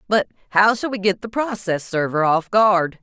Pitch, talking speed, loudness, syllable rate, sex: 200 Hz, 200 wpm, -19 LUFS, 4.7 syllables/s, female